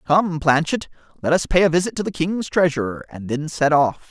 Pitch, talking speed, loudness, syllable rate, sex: 160 Hz, 220 wpm, -20 LUFS, 5.4 syllables/s, male